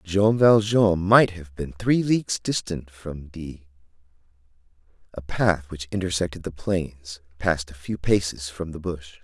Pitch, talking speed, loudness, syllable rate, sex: 85 Hz, 150 wpm, -23 LUFS, 4.3 syllables/s, male